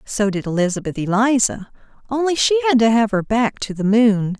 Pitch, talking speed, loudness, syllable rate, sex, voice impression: 225 Hz, 190 wpm, -18 LUFS, 5.3 syllables/s, female, feminine, adult-like, clear, fluent, slightly refreshing, slightly calm, elegant